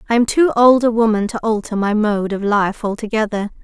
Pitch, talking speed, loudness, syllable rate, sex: 220 Hz, 215 wpm, -16 LUFS, 5.5 syllables/s, female